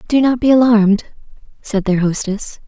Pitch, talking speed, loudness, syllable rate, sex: 220 Hz, 155 wpm, -15 LUFS, 5.3 syllables/s, female